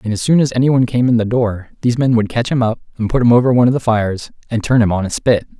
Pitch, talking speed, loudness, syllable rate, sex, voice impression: 115 Hz, 310 wpm, -15 LUFS, 7.1 syllables/s, male, masculine, adult-like, slightly clear, slightly fluent, refreshing, sincere, slightly kind